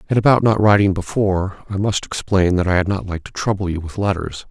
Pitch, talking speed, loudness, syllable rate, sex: 95 Hz, 225 wpm, -18 LUFS, 6.1 syllables/s, male